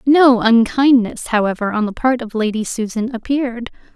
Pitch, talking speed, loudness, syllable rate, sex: 235 Hz, 150 wpm, -16 LUFS, 5.0 syllables/s, female